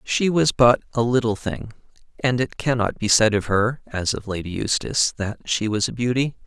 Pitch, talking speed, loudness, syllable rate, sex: 120 Hz, 195 wpm, -21 LUFS, 5.1 syllables/s, male